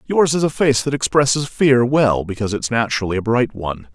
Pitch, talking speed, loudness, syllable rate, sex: 125 Hz, 215 wpm, -17 LUFS, 5.8 syllables/s, male